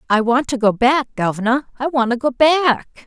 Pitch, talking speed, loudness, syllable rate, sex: 255 Hz, 195 wpm, -17 LUFS, 5.1 syllables/s, female